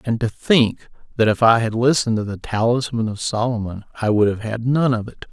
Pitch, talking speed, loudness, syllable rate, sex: 115 Hz, 225 wpm, -19 LUFS, 5.5 syllables/s, male